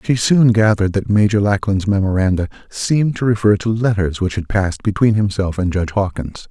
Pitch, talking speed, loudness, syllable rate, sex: 100 Hz, 185 wpm, -16 LUFS, 5.6 syllables/s, male